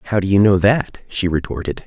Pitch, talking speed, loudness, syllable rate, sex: 100 Hz, 225 wpm, -17 LUFS, 5.2 syllables/s, male